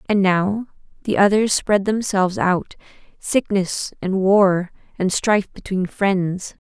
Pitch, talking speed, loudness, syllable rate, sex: 195 Hz, 115 wpm, -19 LUFS, 3.8 syllables/s, female